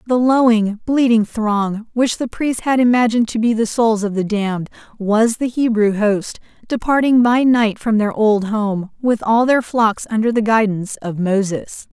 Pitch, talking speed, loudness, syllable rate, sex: 225 Hz, 180 wpm, -17 LUFS, 4.5 syllables/s, female